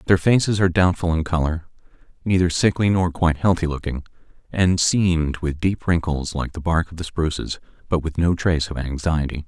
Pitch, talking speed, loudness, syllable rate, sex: 85 Hz, 185 wpm, -21 LUFS, 5.5 syllables/s, male